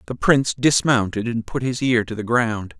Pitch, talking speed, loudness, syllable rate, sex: 120 Hz, 215 wpm, -20 LUFS, 5.0 syllables/s, male